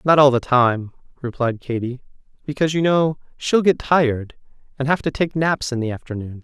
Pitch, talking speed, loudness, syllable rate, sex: 135 Hz, 185 wpm, -20 LUFS, 5.3 syllables/s, male